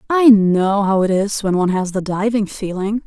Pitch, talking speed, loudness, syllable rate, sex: 200 Hz, 215 wpm, -16 LUFS, 4.9 syllables/s, female